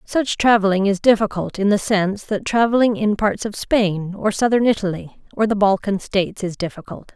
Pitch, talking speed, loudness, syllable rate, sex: 205 Hz, 185 wpm, -19 LUFS, 5.2 syllables/s, female